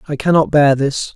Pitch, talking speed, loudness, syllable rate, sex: 145 Hz, 210 wpm, -14 LUFS, 5.1 syllables/s, male